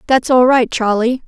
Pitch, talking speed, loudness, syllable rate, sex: 245 Hz, 190 wpm, -13 LUFS, 4.6 syllables/s, female